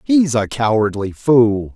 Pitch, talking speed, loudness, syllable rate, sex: 125 Hz, 135 wpm, -16 LUFS, 3.6 syllables/s, male